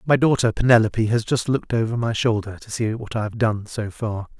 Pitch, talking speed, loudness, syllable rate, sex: 110 Hz, 230 wpm, -21 LUFS, 5.7 syllables/s, male